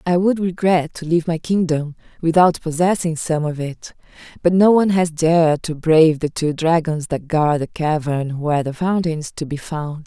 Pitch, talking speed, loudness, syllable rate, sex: 160 Hz, 195 wpm, -18 LUFS, 5.0 syllables/s, female